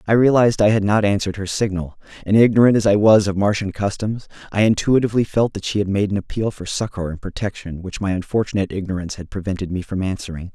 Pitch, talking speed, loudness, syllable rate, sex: 100 Hz, 215 wpm, -19 LUFS, 6.6 syllables/s, male